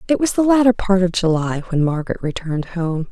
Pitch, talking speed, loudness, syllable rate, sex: 190 Hz, 210 wpm, -18 LUFS, 5.9 syllables/s, female